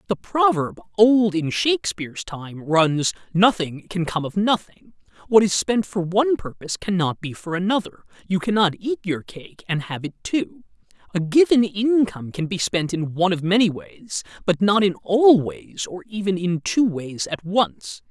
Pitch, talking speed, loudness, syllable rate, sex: 190 Hz, 180 wpm, -21 LUFS, 4.6 syllables/s, male